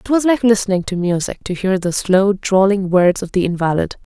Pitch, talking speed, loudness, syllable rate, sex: 195 Hz, 215 wpm, -16 LUFS, 5.4 syllables/s, female